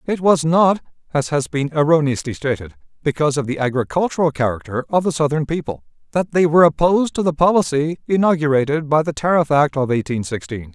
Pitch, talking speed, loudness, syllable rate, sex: 150 Hz, 180 wpm, -18 LUFS, 6.0 syllables/s, male